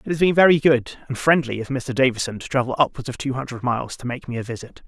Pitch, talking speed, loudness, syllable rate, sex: 130 Hz, 270 wpm, -21 LUFS, 6.6 syllables/s, male